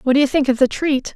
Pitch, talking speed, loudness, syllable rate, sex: 270 Hz, 310 wpm, -17 LUFS, 5.7 syllables/s, female